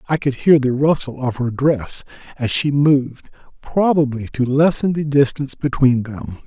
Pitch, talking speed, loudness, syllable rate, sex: 135 Hz, 165 wpm, -17 LUFS, 4.7 syllables/s, male